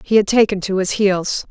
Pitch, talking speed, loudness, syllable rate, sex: 200 Hz, 240 wpm, -16 LUFS, 5.1 syllables/s, female